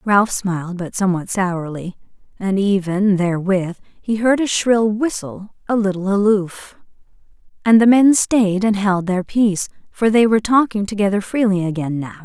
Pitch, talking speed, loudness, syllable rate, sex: 200 Hz, 155 wpm, -17 LUFS, 4.7 syllables/s, female